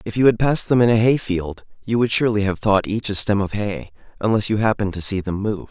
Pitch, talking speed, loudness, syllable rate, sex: 105 Hz, 275 wpm, -19 LUFS, 6.2 syllables/s, male